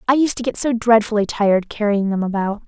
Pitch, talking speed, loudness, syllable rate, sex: 220 Hz, 225 wpm, -18 LUFS, 6.1 syllables/s, female